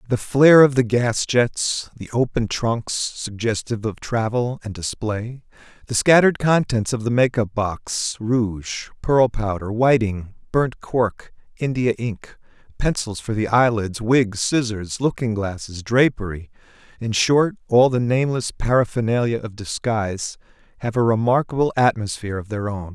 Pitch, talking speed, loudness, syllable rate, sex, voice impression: 115 Hz, 135 wpm, -20 LUFS, 4.4 syllables/s, male, very masculine, very adult-like, thick, tensed, powerful, bright, soft, clear, fluent, slightly raspy, cool, very intellectual, refreshing, sincere, very calm, mature, friendly, very reassuring, unique, elegant, slightly wild, sweet, lively, kind, slightly modest